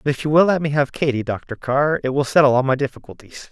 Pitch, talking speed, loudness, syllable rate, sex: 140 Hz, 275 wpm, -19 LUFS, 6.2 syllables/s, male